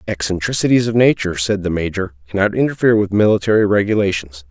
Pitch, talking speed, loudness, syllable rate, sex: 100 Hz, 145 wpm, -16 LUFS, 6.7 syllables/s, male